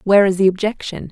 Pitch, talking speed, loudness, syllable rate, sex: 195 Hz, 215 wpm, -16 LUFS, 6.9 syllables/s, female